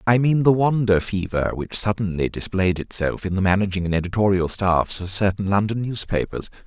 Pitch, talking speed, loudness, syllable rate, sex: 100 Hz, 170 wpm, -21 LUFS, 5.3 syllables/s, male